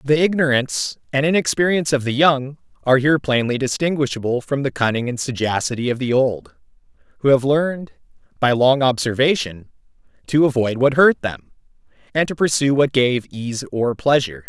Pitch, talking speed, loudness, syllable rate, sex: 130 Hz, 155 wpm, -18 LUFS, 5.4 syllables/s, male